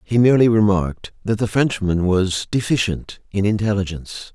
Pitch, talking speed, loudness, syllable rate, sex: 100 Hz, 140 wpm, -19 LUFS, 5.5 syllables/s, male